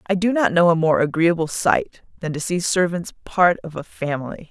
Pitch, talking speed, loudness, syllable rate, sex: 170 Hz, 215 wpm, -20 LUFS, 5.1 syllables/s, female